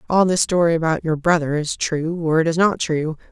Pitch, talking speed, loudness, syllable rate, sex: 165 Hz, 215 wpm, -19 LUFS, 5.0 syllables/s, female